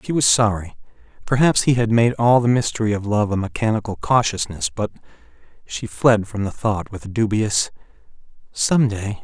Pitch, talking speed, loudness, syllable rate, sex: 110 Hz, 155 wpm, -19 LUFS, 5.2 syllables/s, male